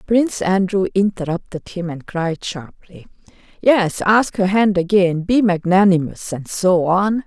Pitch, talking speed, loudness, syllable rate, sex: 190 Hz, 140 wpm, -17 LUFS, 4.2 syllables/s, female